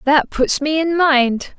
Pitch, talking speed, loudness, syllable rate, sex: 290 Hz, 190 wpm, -16 LUFS, 3.4 syllables/s, female